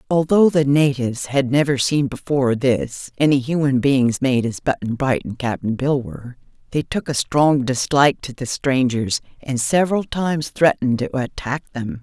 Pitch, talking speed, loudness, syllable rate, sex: 135 Hz, 170 wpm, -19 LUFS, 4.8 syllables/s, female